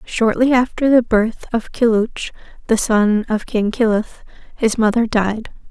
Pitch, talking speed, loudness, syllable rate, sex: 225 Hz, 145 wpm, -17 LUFS, 4.3 syllables/s, female